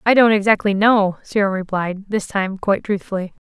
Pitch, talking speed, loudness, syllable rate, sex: 200 Hz, 175 wpm, -18 LUFS, 5.4 syllables/s, female